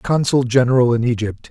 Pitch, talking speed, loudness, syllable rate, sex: 125 Hz, 160 wpm, -16 LUFS, 5.4 syllables/s, male